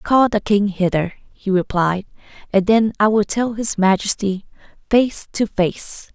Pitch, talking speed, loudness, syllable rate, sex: 205 Hz, 155 wpm, -18 LUFS, 4.0 syllables/s, female